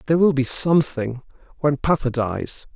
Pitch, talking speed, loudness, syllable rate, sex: 140 Hz, 130 wpm, -20 LUFS, 5.1 syllables/s, male